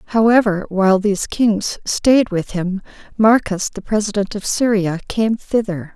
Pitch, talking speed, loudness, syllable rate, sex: 205 Hz, 140 wpm, -17 LUFS, 4.3 syllables/s, female